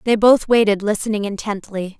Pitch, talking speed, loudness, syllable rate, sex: 210 Hz, 150 wpm, -18 LUFS, 5.4 syllables/s, female